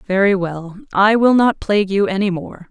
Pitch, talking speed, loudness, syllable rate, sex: 200 Hz, 200 wpm, -16 LUFS, 4.9 syllables/s, female